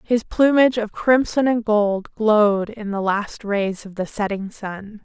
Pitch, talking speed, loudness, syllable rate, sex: 215 Hz, 180 wpm, -20 LUFS, 4.1 syllables/s, female